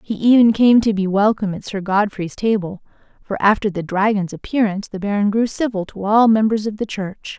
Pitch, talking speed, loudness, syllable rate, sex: 205 Hz, 205 wpm, -18 LUFS, 5.5 syllables/s, female